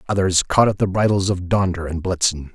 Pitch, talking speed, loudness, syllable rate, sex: 95 Hz, 215 wpm, -19 LUFS, 5.5 syllables/s, male